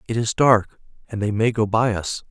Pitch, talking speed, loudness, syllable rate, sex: 110 Hz, 235 wpm, -20 LUFS, 5.0 syllables/s, male